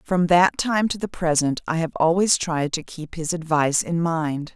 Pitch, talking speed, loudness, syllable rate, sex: 165 Hz, 210 wpm, -21 LUFS, 4.6 syllables/s, female